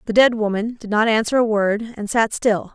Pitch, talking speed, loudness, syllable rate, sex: 220 Hz, 260 wpm, -19 LUFS, 5.4 syllables/s, female